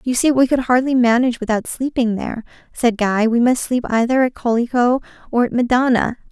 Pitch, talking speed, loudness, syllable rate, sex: 240 Hz, 190 wpm, -17 LUFS, 5.7 syllables/s, female